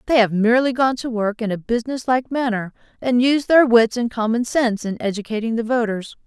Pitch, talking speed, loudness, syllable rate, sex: 235 Hz, 210 wpm, -19 LUFS, 5.7 syllables/s, female